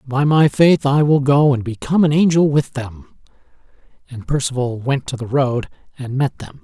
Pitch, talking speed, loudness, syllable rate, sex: 135 Hz, 190 wpm, -17 LUFS, 5.0 syllables/s, male